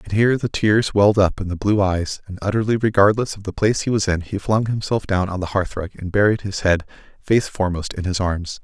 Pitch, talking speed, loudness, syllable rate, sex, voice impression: 100 Hz, 245 wpm, -20 LUFS, 5.9 syllables/s, male, very masculine, very adult-like, old, very thick, tensed, very powerful, slightly dark, slightly hard, muffled, fluent, slightly raspy, very cool, very intellectual, sincere, very calm, very mature, friendly, very reassuring, very unique, slightly elegant, very wild, sweet, slightly lively, very kind, slightly modest